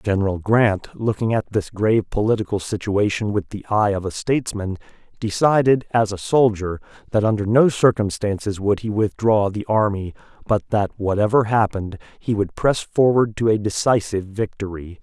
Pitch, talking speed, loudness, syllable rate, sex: 105 Hz, 155 wpm, -20 LUFS, 5.1 syllables/s, male